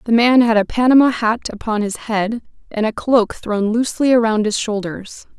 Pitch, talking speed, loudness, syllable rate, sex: 225 Hz, 190 wpm, -17 LUFS, 5.0 syllables/s, female